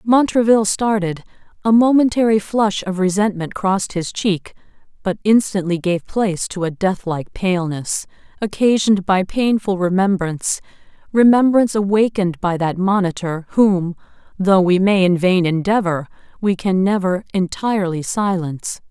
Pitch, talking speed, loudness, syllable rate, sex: 195 Hz, 125 wpm, -17 LUFS, 4.9 syllables/s, female